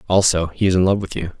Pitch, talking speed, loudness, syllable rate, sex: 90 Hz, 300 wpm, -18 LUFS, 6.8 syllables/s, male